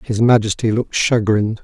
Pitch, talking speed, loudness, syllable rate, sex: 110 Hz, 145 wpm, -16 LUFS, 5.9 syllables/s, male